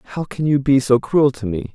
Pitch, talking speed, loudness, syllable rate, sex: 135 Hz, 275 wpm, -18 LUFS, 5.7 syllables/s, male